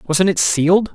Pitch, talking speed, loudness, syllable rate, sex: 180 Hz, 190 wpm, -15 LUFS, 4.4 syllables/s, male